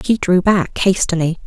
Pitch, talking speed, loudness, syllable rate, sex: 185 Hz, 165 wpm, -16 LUFS, 4.6 syllables/s, female